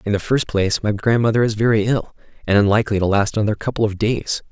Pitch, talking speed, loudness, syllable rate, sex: 110 Hz, 225 wpm, -18 LUFS, 6.7 syllables/s, male